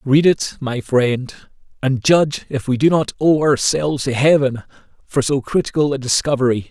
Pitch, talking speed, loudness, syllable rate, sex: 135 Hz, 170 wpm, -17 LUFS, 4.9 syllables/s, male